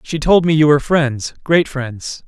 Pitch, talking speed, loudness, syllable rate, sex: 150 Hz, 185 wpm, -15 LUFS, 4.4 syllables/s, male